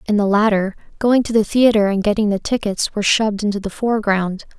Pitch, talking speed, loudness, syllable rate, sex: 210 Hz, 210 wpm, -17 LUFS, 6.0 syllables/s, female